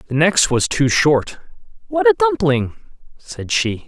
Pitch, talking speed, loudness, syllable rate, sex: 135 Hz, 155 wpm, -16 LUFS, 3.7 syllables/s, male